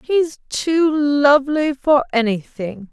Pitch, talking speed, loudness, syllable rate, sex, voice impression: 275 Hz, 105 wpm, -17 LUFS, 3.4 syllables/s, female, feminine, slightly young, slightly bright, slightly muffled, slightly halting, friendly, unique, slightly lively, slightly intense